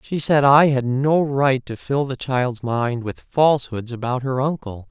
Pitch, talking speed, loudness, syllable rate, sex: 130 Hz, 195 wpm, -20 LUFS, 4.2 syllables/s, male